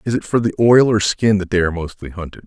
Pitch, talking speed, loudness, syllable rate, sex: 100 Hz, 290 wpm, -16 LUFS, 6.6 syllables/s, male